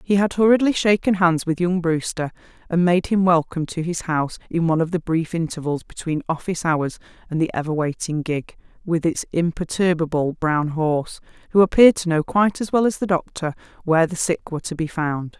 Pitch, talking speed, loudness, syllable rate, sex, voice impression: 170 Hz, 200 wpm, -21 LUFS, 5.7 syllables/s, female, feminine, very adult-like, slightly intellectual, calm, elegant